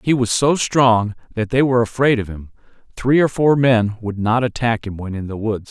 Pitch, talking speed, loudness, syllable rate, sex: 115 Hz, 230 wpm, -18 LUFS, 5.0 syllables/s, male